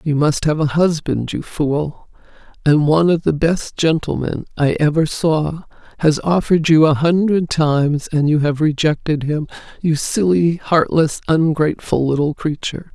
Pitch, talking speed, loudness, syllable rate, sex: 155 Hz, 155 wpm, -17 LUFS, 4.6 syllables/s, female